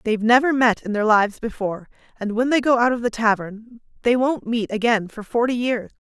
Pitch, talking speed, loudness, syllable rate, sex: 230 Hz, 215 wpm, -20 LUFS, 5.9 syllables/s, female